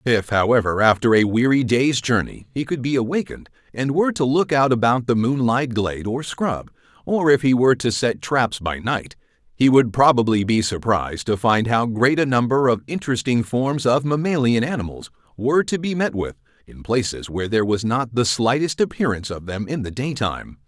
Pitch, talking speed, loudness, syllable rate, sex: 125 Hz, 195 wpm, -20 LUFS, 5.4 syllables/s, male